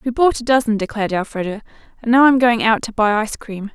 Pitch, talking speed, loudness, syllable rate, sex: 230 Hz, 240 wpm, -17 LUFS, 6.4 syllables/s, female